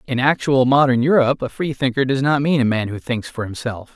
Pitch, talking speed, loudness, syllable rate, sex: 130 Hz, 230 wpm, -18 LUFS, 5.8 syllables/s, male